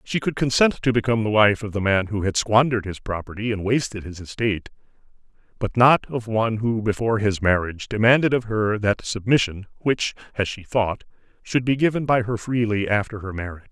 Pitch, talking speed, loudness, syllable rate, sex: 110 Hz, 195 wpm, -22 LUFS, 5.7 syllables/s, male